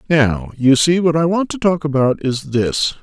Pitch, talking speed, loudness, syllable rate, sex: 150 Hz, 220 wpm, -16 LUFS, 4.4 syllables/s, male